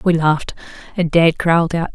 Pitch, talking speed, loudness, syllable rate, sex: 165 Hz, 185 wpm, -16 LUFS, 5.7 syllables/s, female